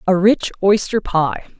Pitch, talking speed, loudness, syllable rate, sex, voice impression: 190 Hz, 150 wpm, -17 LUFS, 4.2 syllables/s, female, very feminine, adult-like, thin, tensed, slightly powerful, bright, hard, clear, fluent, slightly raspy, slightly cute, intellectual, very refreshing, sincere, calm, friendly, reassuring, unique, slightly elegant, wild, slightly sweet, lively, strict, slightly intense, sharp